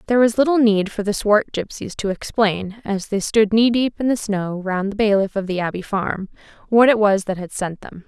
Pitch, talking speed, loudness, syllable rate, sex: 210 Hz, 240 wpm, -19 LUFS, 5.2 syllables/s, female